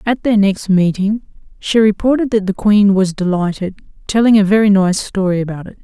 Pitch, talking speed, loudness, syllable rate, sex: 200 Hz, 185 wpm, -14 LUFS, 5.4 syllables/s, female